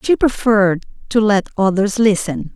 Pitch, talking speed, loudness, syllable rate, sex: 205 Hz, 140 wpm, -16 LUFS, 4.7 syllables/s, female